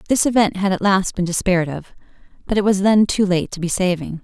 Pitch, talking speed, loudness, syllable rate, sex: 190 Hz, 240 wpm, -18 LUFS, 6.0 syllables/s, female